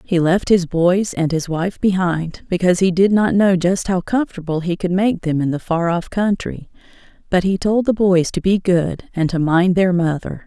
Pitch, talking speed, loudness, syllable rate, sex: 180 Hz, 220 wpm, -17 LUFS, 4.8 syllables/s, female